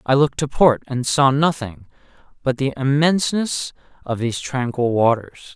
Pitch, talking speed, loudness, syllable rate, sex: 135 Hz, 150 wpm, -19 LUFS, 4.9 syllables/s, male